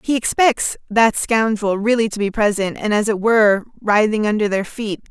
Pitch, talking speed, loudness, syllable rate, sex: 215 Hz, 190 wpm, -17 LUFS, 4.8 syllables/s, female